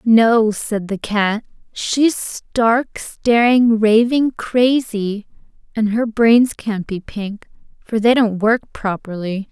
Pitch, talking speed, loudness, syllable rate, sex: 220 Hz, 125 wpm, -17 LUFS, 3.0 syllables/s, female